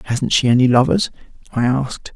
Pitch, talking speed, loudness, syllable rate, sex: 130 Hz, 165 wpm, -17 LUFS, 6.0 syllables/s, male